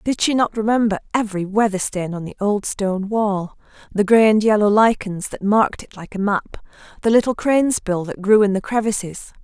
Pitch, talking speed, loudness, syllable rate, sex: 210 Hz, 205 wpm, -19 LUFS, 5.5 syllables/s, female